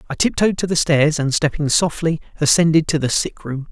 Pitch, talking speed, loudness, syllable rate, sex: 155 Hz, 210 wpm, -17 LUFS, 5.4 syllables/s, male